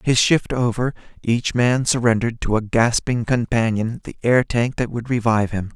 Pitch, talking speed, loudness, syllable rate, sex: 115 Hz, 175 wpm, -20 LUFS, 5.0 syllables/s, male